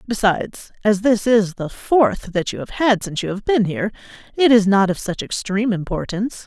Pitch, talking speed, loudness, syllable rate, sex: 210 Hz, 205 wpm, -19 LUFS, 5.4 syllables/s, female